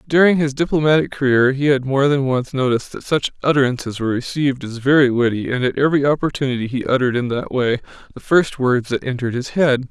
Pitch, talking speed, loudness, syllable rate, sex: 130 Hz, 205 wpm, -18 LUFS, 6.4 syllables/s, male